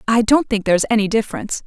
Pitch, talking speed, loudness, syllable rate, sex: 220 Hz, 215 wpm, -17 LUFS, 7.5 syllables/s, female